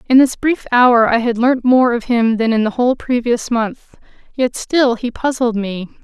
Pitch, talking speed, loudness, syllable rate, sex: 240 Hz, 210 wpm, -15 LUFS, 4.5 syllables/s, female